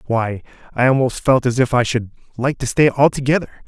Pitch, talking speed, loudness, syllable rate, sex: 125 Hz, 195 wpm, -17 LUFS, 5.7 syllables/s, male